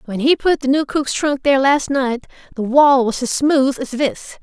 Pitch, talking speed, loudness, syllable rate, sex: 270 Hz, 230 wpm, -16 LUFS, 4.6 syllables/s, female